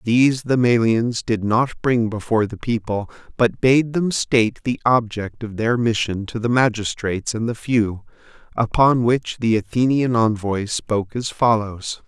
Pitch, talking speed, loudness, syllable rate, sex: 115 Hz, 160 wpm, -20 LUFS, 4.5 syllables/s, male